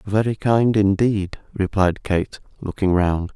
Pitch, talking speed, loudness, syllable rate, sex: 100 Hz, 125 wpm, -20 LUFS, 3.8 syllables/s, male